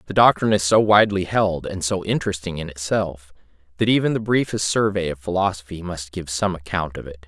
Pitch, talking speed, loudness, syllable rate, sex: 90 Hz, 200 wpm, -21 LUFS, 5.9 syllables/s, male